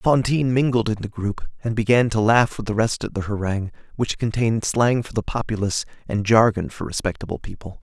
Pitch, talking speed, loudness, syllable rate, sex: 110 Hz, 200 wpm, -22 LUFS, 5.9 syllables/s, male